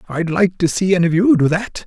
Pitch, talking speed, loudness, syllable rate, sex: 180 Hz, 290 wpm, -16 LUFS, 5.9 syllables/s, male